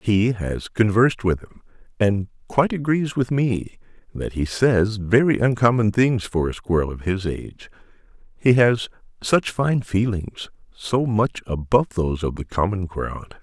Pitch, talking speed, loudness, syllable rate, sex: 110 Hz, 150 wpm, -21 LUFS, 4.5 syllables/s, male